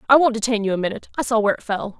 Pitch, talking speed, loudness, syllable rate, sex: 225 Hz, 300 wpm, -20 LUFS, 8.9 syllables/s, female